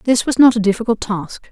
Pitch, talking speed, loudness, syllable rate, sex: 225 Hz, 240 wpm, -15 LUFS, 5.8 syllables/s, female